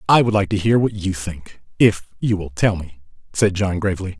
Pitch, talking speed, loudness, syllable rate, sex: 95 Hz, 230 wpm, -19 LUFS, 5.4 syllables/s, male